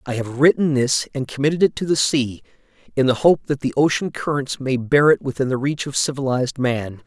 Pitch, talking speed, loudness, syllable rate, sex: 135 Hz, 220 wpm, -19 LUFS, 5.5 syllables/s, male